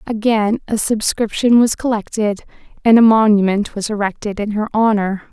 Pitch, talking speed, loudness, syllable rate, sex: 215 Hz, 145 wpm, -16 LUFS, 5.0 syllables/s, female